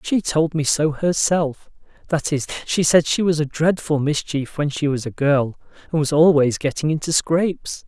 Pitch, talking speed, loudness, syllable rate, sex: 150 Hz, 185 wpm, -20 LUFS, 4.7 syllables/s, male